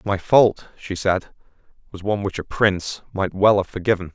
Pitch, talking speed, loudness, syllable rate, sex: 95 Hz, 190 wpm, -20 LUFS, 5.2 syllables/s, male